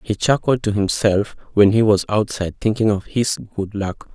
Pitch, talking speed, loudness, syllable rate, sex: 105 Hz, 190 wpm, -19 LUFS, 4.9 syllables/s, male